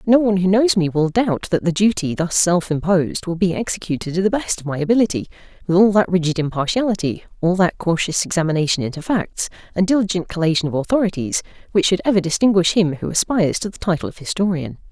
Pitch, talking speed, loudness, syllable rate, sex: 180 Hz, 200 wpm, -19 LUFS, 6.3 syllables/s, female